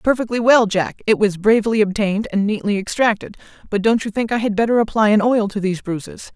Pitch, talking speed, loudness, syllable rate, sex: 215 Hz, 215 wpm, -18 LUFS, 6.1 syllables/s, female